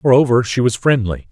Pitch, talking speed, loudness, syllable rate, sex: 120 Hz, 185 wpm, -15 LUFS, 5.8 syllables/s, male